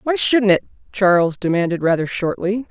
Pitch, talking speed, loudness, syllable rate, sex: 195 Hz, 155 wpm, -18 LUFS, 5.1 syllables/s, female